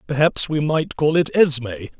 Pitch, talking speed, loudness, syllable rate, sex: 145 Hz, 180 wpm, -18 LUFS, 5.2 syllables/s, male